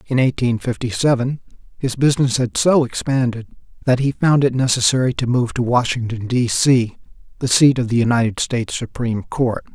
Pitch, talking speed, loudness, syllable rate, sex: 125 Hz, 170 wpm, -18 LUFS, 5.4 syllables/s, male